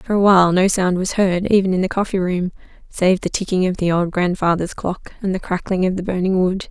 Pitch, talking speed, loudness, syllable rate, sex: 185 Hz, 240 wpm, -18 LUFS, 5.7 syllables/s, female